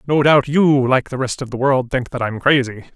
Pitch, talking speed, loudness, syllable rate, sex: 130 Hz, 265 wpm, -17 LUFS, 5.3 syllables/s, male